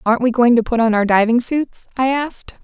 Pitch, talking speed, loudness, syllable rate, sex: 240 Hz, 250 wpm, -16 LUFS, 5.9 syllables/s, female